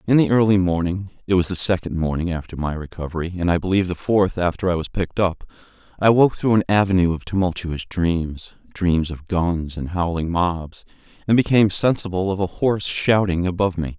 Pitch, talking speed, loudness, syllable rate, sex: 90 Hz, 185 wpm, -20 LUFS, 3.8 syllables/s, male